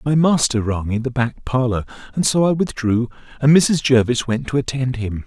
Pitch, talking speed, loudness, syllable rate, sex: 130 Hz, 205 wpm, -18 LUFS, 5.0 syllables/s, male